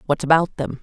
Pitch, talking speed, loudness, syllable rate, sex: 155 Hz, 220 wpm, -19 LUFS, 6.0 syllables/s, female